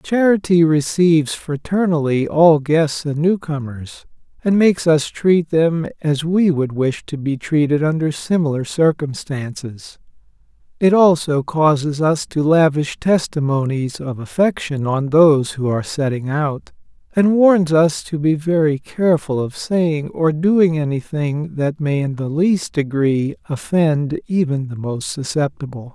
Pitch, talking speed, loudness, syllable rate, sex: 155 Hz, 140 wpm, -17 LUFS, 4.1 syllables/s, male